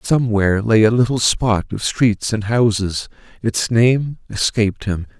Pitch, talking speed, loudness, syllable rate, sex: 110 Hz, 150 wpm, -17 LUFS, 4.4 syllables/s, male